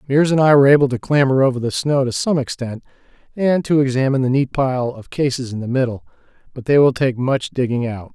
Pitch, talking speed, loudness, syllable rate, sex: 135 Hz, 230 wpm, -17 LUFS, 6.2 syllables/s, male